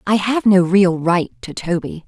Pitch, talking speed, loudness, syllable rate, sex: 190 Hz, 200 wpm, -16 LUFS, 4.4 syllables/s, female